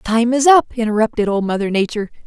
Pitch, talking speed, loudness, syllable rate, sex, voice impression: 225 Hz, 185 wpm, -16 LUFS, 6.4 syllables/s, female, feminine, slightly young, slightly adult-like, thin, tensed, slightly powerful, bright, hard, clear, slightly fluent, slightly cute, slightly cool, intellectual, refreshing, very sincere, slightly calm, friendly, slightly reassuring, slightly unique, elegant, slightly wild, slightly sweet, very lively, slightly strict, slightly intense, slightly sharp